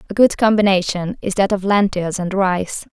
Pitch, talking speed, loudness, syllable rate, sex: 195 Hz, 185 wpm, -17 LUFS, 4.9 syllables/s, female